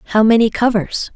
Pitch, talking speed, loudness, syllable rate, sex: 220 Hz, 155 wpm, -15 LUFS, 5.8 syllables/s, female